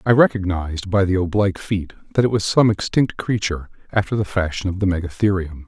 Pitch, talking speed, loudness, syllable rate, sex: 95 Hz, 190 wpm, -20 LUFS, 6.1 syllables/s, male